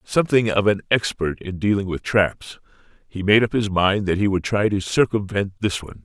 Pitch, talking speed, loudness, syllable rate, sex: 100 Hz, 210 wpm, -20 LUFS, 5.2 syllables/s, male